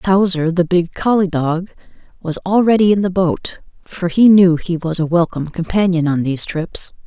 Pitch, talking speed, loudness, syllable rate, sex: 175 Hz, 180 wpm, -16 LUFS, 4.9 syllables/s, female